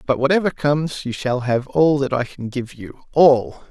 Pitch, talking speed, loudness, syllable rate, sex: 135 Hz, 195 wpm, -19 LUFS, 4.7 syllables/s, male